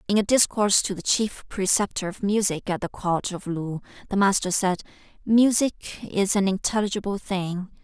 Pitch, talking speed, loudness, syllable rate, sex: 195 Hz, 170 wpm, -23 LUFS, 5.1 syllables/s, female